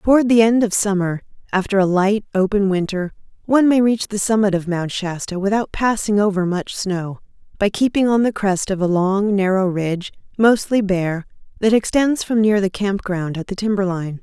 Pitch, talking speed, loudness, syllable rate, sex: 200 Hz, 190 wpm, -18 LUFS, 5.1 syllables/s, female